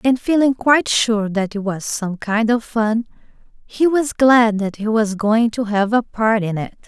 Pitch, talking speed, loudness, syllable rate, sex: 225 Hz, 210 wpm, -17 LUFS, 4.2 syllables/s, female